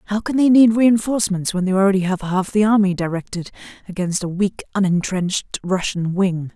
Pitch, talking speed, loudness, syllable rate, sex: 195 Hz, 175 wpm, -18 LUFS, 5.7 syllables/s, female